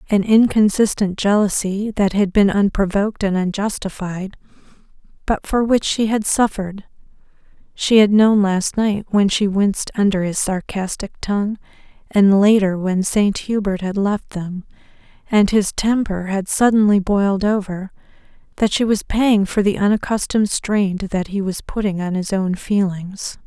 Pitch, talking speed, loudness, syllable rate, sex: 200 Hz, 150 wpm, -18 LUFS, 4.6 syllables/s, female